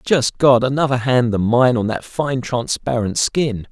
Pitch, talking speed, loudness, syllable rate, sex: 125 Hz, 180 wpm, -17 LUFS, 4.2 syllables/s, male